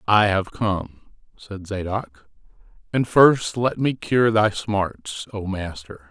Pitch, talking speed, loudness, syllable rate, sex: 105 Hz, 140 wpm, -21 LUFS, 3.4 syllables/s, male